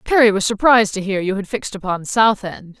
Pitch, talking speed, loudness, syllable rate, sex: 205 Hz, 235 wpm, -17 LUFS, 6.0 syllables/s, female